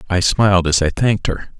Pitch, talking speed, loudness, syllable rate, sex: 95 Hz, 225 wpm, -16 LUFS, 5.9 syllables/s, male